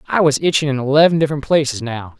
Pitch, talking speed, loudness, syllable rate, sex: 140 Hz, 220 wpm, -16 LUFS, 6.9 syllables/s, male